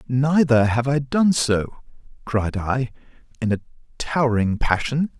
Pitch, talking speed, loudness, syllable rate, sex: 125 Hz, 125 wpm, -21 LUFS, 4.0 syllables/s, male